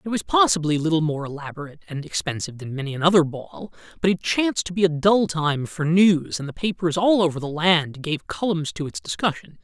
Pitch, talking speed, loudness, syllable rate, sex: 165 Hz, 210 wpm, -22 LUFS, 5.8 syllables/s, male